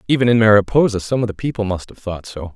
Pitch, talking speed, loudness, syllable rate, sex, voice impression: 105 Hz, 260 wpm, -17 LUFS, 6.8 syllables/s, male, masculine, adult-like, tensed, clear, fluent, cool, intellectual, slightly friendly, lively, kind, slightly strict